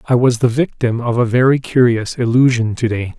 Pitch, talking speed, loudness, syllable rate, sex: 120 Hz, 205 wpm, -15 LUFS, 5.2 syllables/s, male